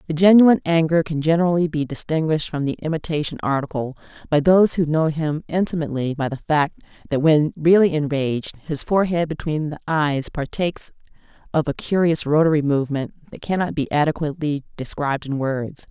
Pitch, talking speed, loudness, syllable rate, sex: 155 Hz, 160 wpm, -20 LUFS, 5.8 syllables/s, female